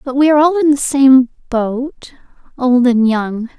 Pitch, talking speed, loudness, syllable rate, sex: 260 Hz, 185 wpm, -13 LUFS, 4.3 syllables/s, female